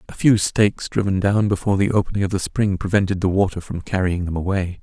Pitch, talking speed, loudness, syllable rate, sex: 95 Hz, 225 wpm, -20 LUFS, 6.2 syllables/s, male